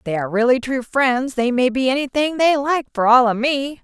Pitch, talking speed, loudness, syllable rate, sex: 255 Hz, 250 wpm, -18 LUFS, 5.3 syllables/s, female